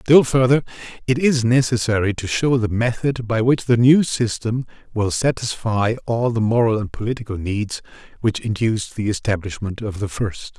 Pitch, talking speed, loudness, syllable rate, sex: 115 Hz, 165 wpm, -20 LUFS, 4.9 syllables/s, male